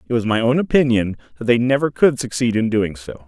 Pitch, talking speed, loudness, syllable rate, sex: 120 Hz, 240 wpm, -18 LUFS, 5.8 syllables/s, male